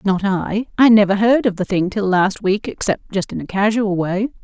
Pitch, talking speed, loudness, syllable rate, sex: 205 Hz, 230 wpm, -17 LUFS, 4.8 syllables/s, female